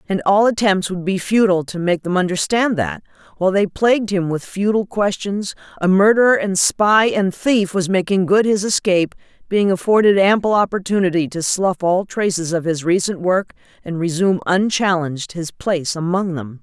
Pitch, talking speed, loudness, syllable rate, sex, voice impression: 190 Hz, 175 wpm, -17 LUFS, 5.2 syllables/s, female, feminine, middle-aged, tensed, powerful, slightly hard, clear, intellectual, elegant, lively, intense